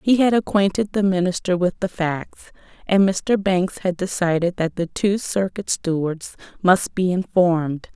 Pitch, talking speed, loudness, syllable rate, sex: 185 Hz, 160 wpm, -20 LUFS, 4.3 syllables/s, female